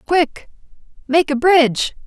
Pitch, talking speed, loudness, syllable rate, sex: 300 Hz, 85 wpm, -16 LUFS, 4.8 syllables/s, female